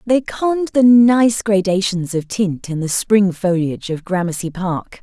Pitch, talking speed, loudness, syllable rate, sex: 195 Hz, 165 wpm, -16 LUFS, 4.3 syllables/s, female